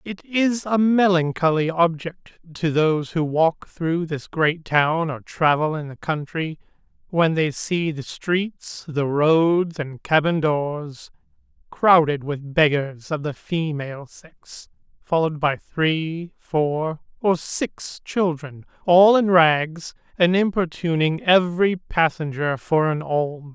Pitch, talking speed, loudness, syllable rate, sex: 160 Hz, 135 wpm, -21 LUFS, 3.5 syllables/s, male